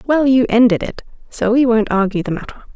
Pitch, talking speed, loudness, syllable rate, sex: 230 Hz, 220 wpm, -15 LUFS, 6.1 syllables/s, female